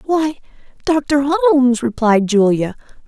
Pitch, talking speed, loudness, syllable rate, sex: 265 Hz, 95 wpm, -16 LUFS, 3.6 syllables/s, female